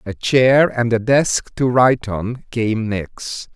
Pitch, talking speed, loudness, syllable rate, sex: 120 Hz, 170 wpm, -17 LUFS, 3.3 syllables/s, male